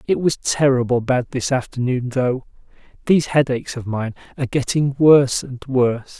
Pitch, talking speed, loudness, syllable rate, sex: 130 Hz, 155 wpm, -19 LUFS, 5.3 syllables/s, male